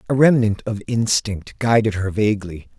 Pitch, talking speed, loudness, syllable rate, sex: 110 Hz, 150 wpm, -19 LUFS, 4.9 syllables/s, male